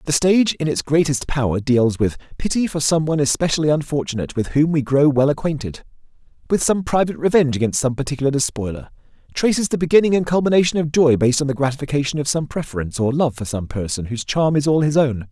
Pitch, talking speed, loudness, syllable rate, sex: 145 Hz, 210 wpm, -19 LUFS, 6.7 syllables/s, male